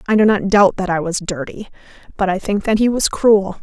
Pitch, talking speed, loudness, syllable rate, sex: 200 Hz, 230 wpm, -16 LUFS, 5.4 syllables/s, female